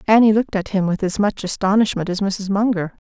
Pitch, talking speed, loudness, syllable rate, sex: 200 Hz, 215 wpm, -19 LUFS, 6.0 syllables/s, female